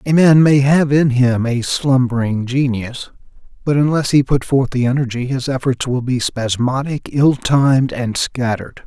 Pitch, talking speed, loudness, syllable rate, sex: 130 Hz, 170 wpm, -16 LUFS, 4.6 syllables/s, male